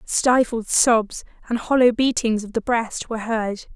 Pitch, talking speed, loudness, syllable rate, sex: 230 Hz, 160 wpm, -20 LUFS, 4.3 syllables/s, female